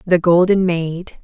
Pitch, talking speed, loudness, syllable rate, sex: 175 Hz, 145 wpm, -16 LUFS, 3.7 syllables/s, female